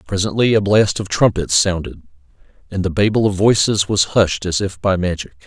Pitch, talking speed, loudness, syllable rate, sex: 95 Hz, 185 wpm, -16 LUFS, 5.2 syllables/s, male